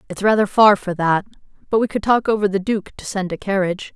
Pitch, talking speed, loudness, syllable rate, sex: 200 Hz, 240 wpm, -18 LUFS, 6.1 syllables/s, female